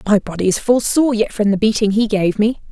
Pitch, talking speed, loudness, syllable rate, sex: 215 Hz, 265 wpm, -16 LUFS, 5.6 syllables/s, female